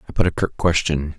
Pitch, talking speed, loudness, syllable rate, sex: 80 Hz, 255 wpm, -21 LUFS, 6.1 syllables/s, male